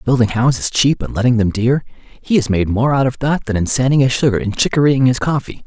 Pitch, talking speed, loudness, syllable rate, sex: 125 Hz, 245 wpm, -15 LUFS, 5.7 syllables/s, male